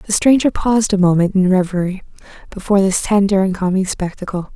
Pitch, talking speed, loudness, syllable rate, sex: 195 Hz, 170 wpm, -16 LUFS, 5.9 syllables/s, female